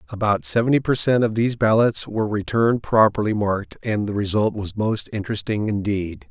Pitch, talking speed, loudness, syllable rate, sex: 110 Hz, 170 wpm, -21 LUFS, 5.7 syllables/s, male